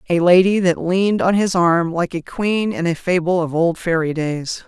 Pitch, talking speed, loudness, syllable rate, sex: 175 Hz, 220 wpm, -17 LUFS, 4.5 syllables/s, female